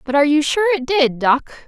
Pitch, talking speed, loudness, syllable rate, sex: 295 Hz, 250 wpm, -16 LUFS, 5.1 syllables/s, female